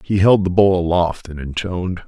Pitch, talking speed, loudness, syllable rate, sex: 90 Hz, 205 wpm, -17 LUFS, 5.1 syllables/s, male